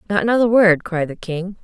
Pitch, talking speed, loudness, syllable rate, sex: 190 Hz, 220 wpm, -17 LUFS, 5.7 syllables/s, female